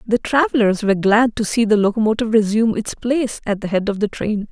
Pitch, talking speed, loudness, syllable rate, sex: 220 Hz, 225 wpm, -18 LUFS, 6.2 syllables/s, female